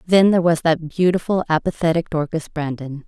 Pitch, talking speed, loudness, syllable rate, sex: 165 Hz, 155 wpm, -19 LUFS, 5.5 syllables/s, female